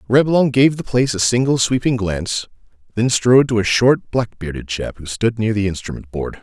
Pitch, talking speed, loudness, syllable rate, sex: 110 Hz, 205 wpm, -17 LUFS, 5.4 syllables/s, male